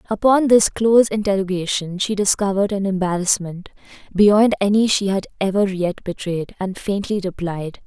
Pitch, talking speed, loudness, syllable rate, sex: 195 Hz, 135 wpm, -19 LUFS, 5.0 syllables/s, female